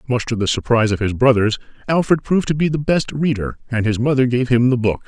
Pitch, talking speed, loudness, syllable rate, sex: 125 Hz, 250 wpm, -18 LUFS, 6.3 syllables/s, male